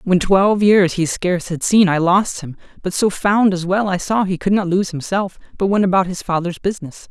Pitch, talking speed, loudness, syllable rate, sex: 185 Hz, 235 wpm, -17 LUFS, 5.3 syllables/s, male